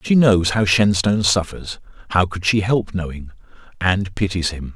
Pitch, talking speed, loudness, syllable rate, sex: 95 Hz, 150 wpm, -18 LUFS, 4.7 syllables/s, male